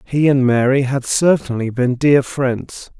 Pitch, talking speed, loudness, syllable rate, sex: 130 Hz, 160 wpm, -16 LUFS, 4.0 syllables/s, male